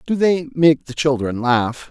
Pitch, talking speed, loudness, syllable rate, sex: 140 Hz, 190 wpm, -18 LUFS, 4.1 syllables/s, male